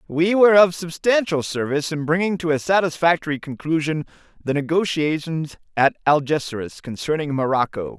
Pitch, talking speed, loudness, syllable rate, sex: 160 Hz, 130 wpm, -20 LUFS, 5.4 syllables/s, male